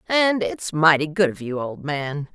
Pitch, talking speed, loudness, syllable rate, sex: 160 Hz, 205 wpm, -21 LUFS, 4.1 syllables/s, female